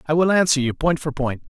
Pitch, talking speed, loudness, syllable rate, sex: 150 Hz, 270 wpm, -20 LUFS, 6.0 syllables/s, male